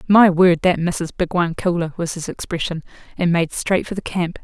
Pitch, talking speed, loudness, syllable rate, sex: 175 Hz, 215 wpm, -19 LUFS, 5.4 syllables/s, female